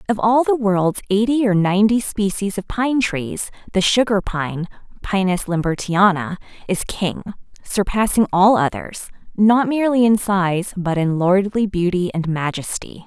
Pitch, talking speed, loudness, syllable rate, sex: 200 Hz, 140 wpm, -18 LUFS, 4.1 syllables/s, female